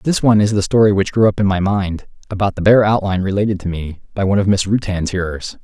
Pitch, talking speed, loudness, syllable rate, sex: 100 Hz, 255 wpm, -16 LUFS, 6.5 syllables/s, male